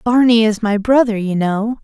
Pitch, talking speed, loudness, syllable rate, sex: 220 Hz, 195 wpm, -15 LUFS, 4.7 syllables/s, female